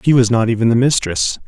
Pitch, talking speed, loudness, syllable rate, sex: 115 Hz, 245 wpm, -15 LUFS, 6.0 syllables/s, male